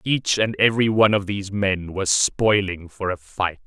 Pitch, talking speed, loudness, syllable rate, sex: 100 Hz, 195 wpm, -21 LUFS, 4.8 syllables/s, male